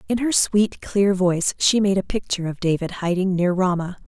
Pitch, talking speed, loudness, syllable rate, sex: 190 Hz, 200 wpm, -21 LUFS, 5.3 syllables/s, female